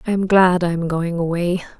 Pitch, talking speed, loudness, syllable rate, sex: 175 Hz, 235 wpm, -18 LUFS, 5.2 syllables/s, female